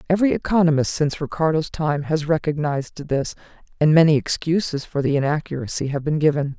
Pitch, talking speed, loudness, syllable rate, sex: 150 Hz, 155 wpm, -21 LUFS, 6.0 syllables/s, female